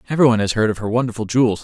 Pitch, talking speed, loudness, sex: 115 Hz, 260 wpm, -18 LUFS, male